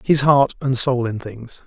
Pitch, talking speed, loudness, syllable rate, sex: 130 Hz, 215 wpm, -17 LUFS, 4.1 syllables/s, male